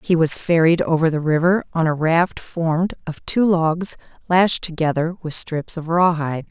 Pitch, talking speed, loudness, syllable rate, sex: 165 Hz, 175 wpm, -19 LUFS, 4.6 syllables/s, female